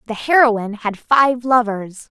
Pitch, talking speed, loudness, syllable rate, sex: 230 Hz, 135 wpm, -16 LUFS, 4.2 syllables/s, female